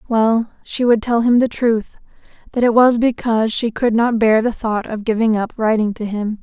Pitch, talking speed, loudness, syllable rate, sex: 225 Hz, 205 wpm, -17 LUFS, 4.8 syllables/s, female